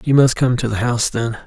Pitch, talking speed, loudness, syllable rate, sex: 120 Hz, 285 wpm, -17 LUFS, 6.2 syllables/s, male